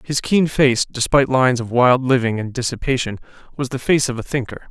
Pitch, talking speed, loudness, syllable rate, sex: 125 Hz, 205 wpm, -18 LUFS, 5.7 syllables/s, male